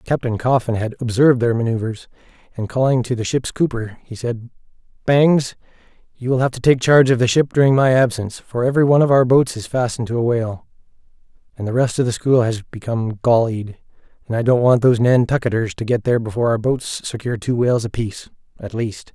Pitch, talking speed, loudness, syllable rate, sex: 120 Hz, 205 wpm, -18 LUFS, 6.3 syllables/s, male